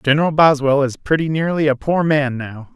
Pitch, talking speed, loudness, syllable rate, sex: 145 Hz, 195 wpm, -16 LUFS, 5.2 syllables/s, male